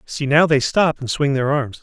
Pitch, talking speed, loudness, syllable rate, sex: 140 Hz, 265 wpm, -18 LUFS, 4.6 syllables/s, male